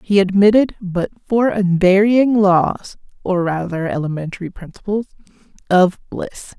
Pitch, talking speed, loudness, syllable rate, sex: 195 Hz, 110 wpm, -16 LUFS, 4.3 syllables/s, female